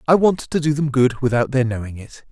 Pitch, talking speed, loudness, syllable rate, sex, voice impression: 135 Hz, 260 wpm, -19 LUFS, 5.6 syllables/s, male, masculine, adult-like, slightly thick, slightly fluent, slightly refreshing, sincere, slightly elegant